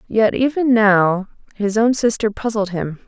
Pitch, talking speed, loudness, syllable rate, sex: 215 Hz, 155 wpm, -17 LUFS, 4.2 syllables/s, female